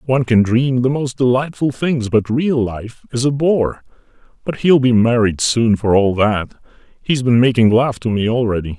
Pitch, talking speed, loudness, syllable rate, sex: 120 Hz, 190 wpm, -16 LUFS, 4.7 syllables/s, male